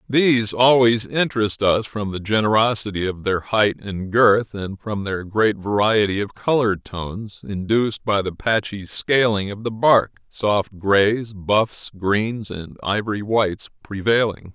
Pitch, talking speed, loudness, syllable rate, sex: 105 Hz, 145 wpm, -20 LUFS, 4.1 syllables/s, male